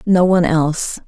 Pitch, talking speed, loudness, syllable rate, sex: 170 Hz, 165 wpm, -15 LUFS, 5.4 syllables/s, female